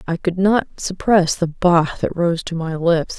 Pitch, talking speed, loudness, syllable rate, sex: 175 Hz, 205 wpm, -18 LUFS, 4.3 syllables/s, female